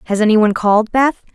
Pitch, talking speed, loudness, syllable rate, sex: 220 Hz, 180 wpm, -14 LUFS, 6.6 syllables/s, female